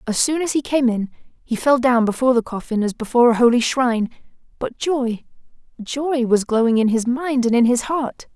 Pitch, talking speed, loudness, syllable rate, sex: 245 Hz, 210 wpm, -19 LUFS, 5.4 syllables/s, female